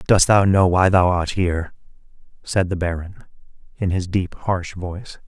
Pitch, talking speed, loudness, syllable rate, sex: 90 Hz, 170 wpm, -19 LUFS, 4.6 syllables/s, male